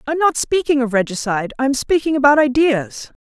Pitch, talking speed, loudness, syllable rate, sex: 270 Hz, 205 wpm, -17 LUFS, 6.1 syllables/s, female